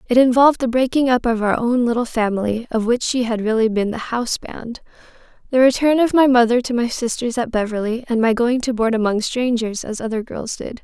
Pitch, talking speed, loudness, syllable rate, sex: 235 Hz, 215 wpm, -18 LUFS, 5.7 syllables/s, female